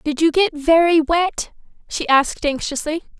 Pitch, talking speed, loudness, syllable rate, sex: 315 Hz, 150 wpm, -17 LUFS, 4.7 syllables/s, female